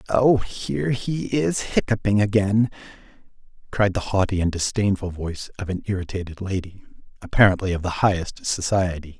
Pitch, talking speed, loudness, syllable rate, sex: 100 Hz, 135 wpm, -22 LUFS, 5.2 syllables/s, male